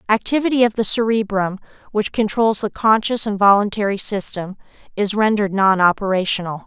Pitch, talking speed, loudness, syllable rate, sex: 205 Hz, 135 wpm, -18 LUFS, 5.6 syllables/s, female